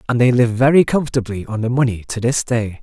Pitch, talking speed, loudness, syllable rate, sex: 120 Hz, 235 wpm, -17 LUFS, 6.1 syllables/s, male